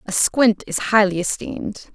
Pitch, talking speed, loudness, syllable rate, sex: 205 Hz, 155 wpm, -19 LUFS, 4.7 syllables/s, female